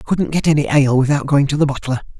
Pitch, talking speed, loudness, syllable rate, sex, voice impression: 140 Hz, 275 wpm, -16 LUFS, 7.3 syllables/s, male, very masculine, very adult-like, middle-aged, very thick, slightly relaxed, slightly weak, very hard, slightly clear, very fluent, cool, very intellectual, slightly refreshing, very sincere, very calm, mature, slightly friendly, reassuring, unique, elegant, wild, slightly sweet, kind, slightly modest